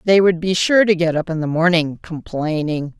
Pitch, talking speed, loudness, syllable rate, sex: 165 Hz, 220 wpm, -17 LUFS, 5.0 syllables/s, female